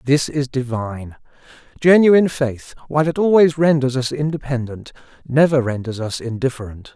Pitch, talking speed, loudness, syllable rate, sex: 135 Hz, 130 wpm, -18 LUFS, 5.3 syllables/s, male